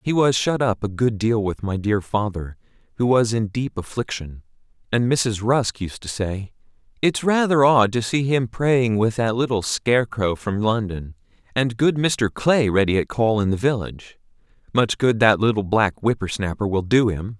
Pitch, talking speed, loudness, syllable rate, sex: 115 Hz, 195 wpm, -21 LUFS, 4.7 syllables/s, male